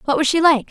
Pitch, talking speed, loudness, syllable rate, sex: 300 Hz, 340 wpm, -16 LUFS, 7.1 syllables/s, female